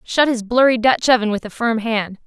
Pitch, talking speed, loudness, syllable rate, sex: 230 Hz, 240 wpm, -17 LUFS, 5.2 syllables/s, female